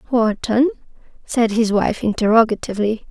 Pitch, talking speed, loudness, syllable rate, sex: 225 Hz, 95 wpm, -18 LUFS, 5.1 syllables/s, female